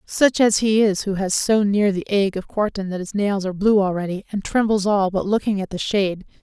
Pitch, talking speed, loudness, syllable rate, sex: 200 Hz, 245 wpm, -20 LUFS, 5.4 syllables/s, female